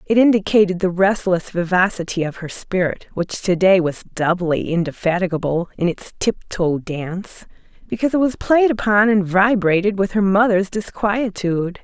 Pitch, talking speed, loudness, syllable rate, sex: 190 Hz, 150 wpm, -18 LUFS, 5.0 syllables/s, female